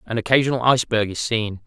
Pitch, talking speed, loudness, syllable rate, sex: 115 Hz, 180 wpm, -20 LUFS, 6.5 syllables/s, male